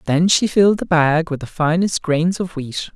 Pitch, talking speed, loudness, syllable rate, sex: 165 Hz, 225 wpm, -17 LUFS, 4.7 syllables/s, male